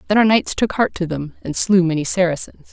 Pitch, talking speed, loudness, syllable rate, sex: 185 Hz, 245 wpm, -18 LUFS, 5.7 syllables/s, female